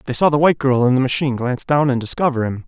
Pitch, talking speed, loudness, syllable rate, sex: 130 Hz, 290 wpm, -17 LUFS, 7.6 syllables/s, male